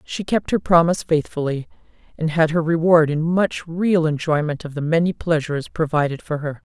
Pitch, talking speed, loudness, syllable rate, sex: 160 Hz, 180 wpm, -20 LUFS, 5.3 syllables/s, female